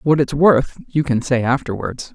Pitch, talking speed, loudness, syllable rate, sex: 135 Hz, 195 wpm, -18 LUFS, 4.4 syllables/s, male